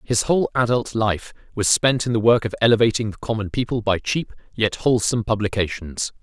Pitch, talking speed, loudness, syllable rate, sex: 110 Hz, 185 wpm, -20 LUFS, 5.8 syllables/s, male